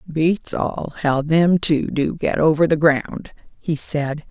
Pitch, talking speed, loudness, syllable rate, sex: 155 Hz, 165 wpm, -19 LUFS, 3.4 syllables/s, female